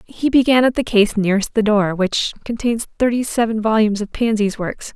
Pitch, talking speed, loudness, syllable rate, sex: 220 Hz, 195 wpm, -17 LUFS, 5.4 syllables/s, female